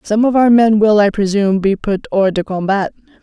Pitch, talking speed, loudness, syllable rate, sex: 210 Hz, 225 wpm, -14 LUFS, 5.3 syllables/s, female